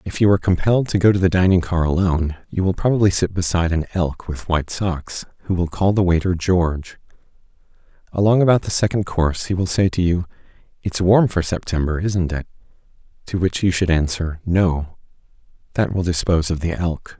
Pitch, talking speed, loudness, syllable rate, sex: 90 Hz, 190 wpm, -19 LUFS, 5.8 syllables/s, male